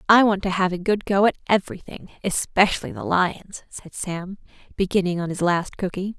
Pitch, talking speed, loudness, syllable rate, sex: 190 Hz, 195 wpm, -22 LUFS, 5.2 syllables/s, female